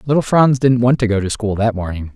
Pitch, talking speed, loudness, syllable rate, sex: 115 Hz, 280 wpm, -16 LUFS, 6.0 syllables/s, male